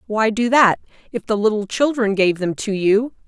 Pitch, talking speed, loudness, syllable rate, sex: 215 Hz, 200 wpm, -18 LUFS, 4.9 syllables/s, female